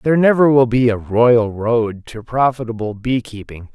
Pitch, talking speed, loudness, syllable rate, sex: 120 Hz, 175 wpm, -16 LUFS, 4.7 syllables/s, male